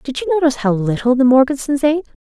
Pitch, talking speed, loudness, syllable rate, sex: 270 Hz, 215 wpm, -15 LUFS, 6.9 syllables/s, female